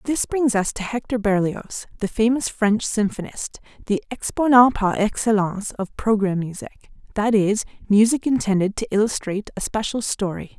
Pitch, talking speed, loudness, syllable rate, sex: 215 Hz, 145 wpm, -21 LUFS, 5.0 syllables/s, female